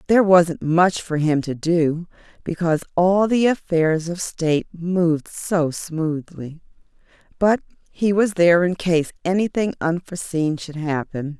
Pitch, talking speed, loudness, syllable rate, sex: 170 Hz, 135 wpm, -20 LUFS, 4.3 syllables/s, female